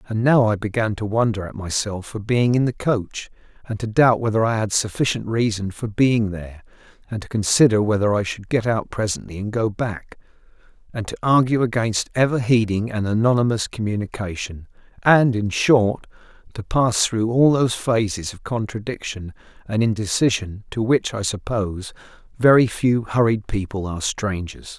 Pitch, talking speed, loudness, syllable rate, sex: 110 Hz, 165 wpm, -20 LUFS, 5.0 syllables/s, male